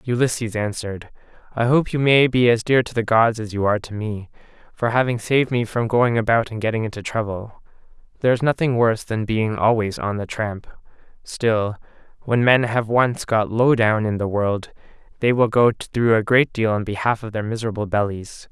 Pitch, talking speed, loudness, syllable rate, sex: 115 Hz, 200 wpm, -20 LUFS, 5.3 syllables/s, male